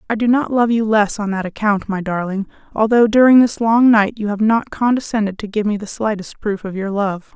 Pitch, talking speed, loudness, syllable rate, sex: 215 Hz, 235 wpm, -17 LUFS, 5.4 syllables/s, female